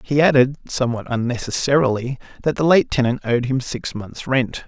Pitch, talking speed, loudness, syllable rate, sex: 130 Hz, 165 wpm, -19 LUFS, 5.3 syllables/s, male